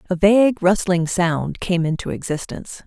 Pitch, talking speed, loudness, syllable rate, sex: 185 Hz, 145 wpm, -19 LUFS, 4.9 syllables/s, female